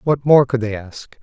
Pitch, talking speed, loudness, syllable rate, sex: 125 Hz, 245 wpm, -16 LUFS, 4.6 syllables/s, male